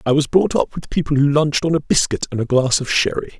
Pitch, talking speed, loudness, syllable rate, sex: 145 Hz, 285 wpm, -18 LUFS, 6.3 syllables/s, male